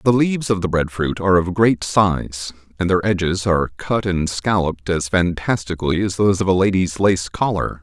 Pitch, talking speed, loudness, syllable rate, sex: 95 Hz, 200 wpm, -19 LUFS, 5.3 syllables/s, male